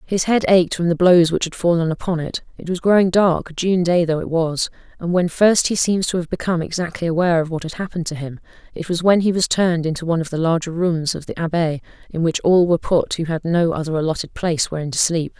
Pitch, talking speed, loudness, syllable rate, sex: 170 Hz, 245 wpm, -19 LUFS, 6.1 syllables/s, female